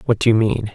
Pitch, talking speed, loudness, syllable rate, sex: 110 Hz, 325 wpm, -17 LUFS, 6.6 syllables/s, male